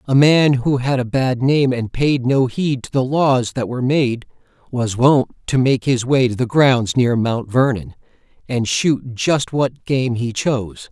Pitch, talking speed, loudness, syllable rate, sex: 130 Hz, 205 wpm, -17 LUFS, 4.1 syllables/s, male